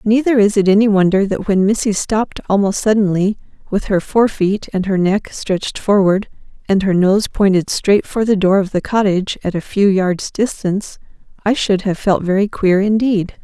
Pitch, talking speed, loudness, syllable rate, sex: 200 Hz, 190 wpm, -15 LUFS, 5.0 syllables/s, female